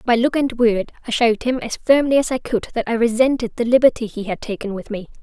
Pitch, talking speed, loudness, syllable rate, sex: 235 Hz, 255 wpm, -19 LUFS, 6.1 syllables/s, female